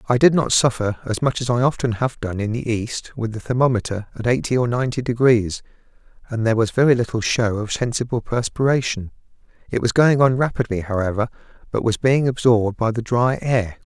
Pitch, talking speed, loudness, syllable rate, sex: 120 Hz, 195 wpm, -20 LUFS, 5.8 syllables/s, male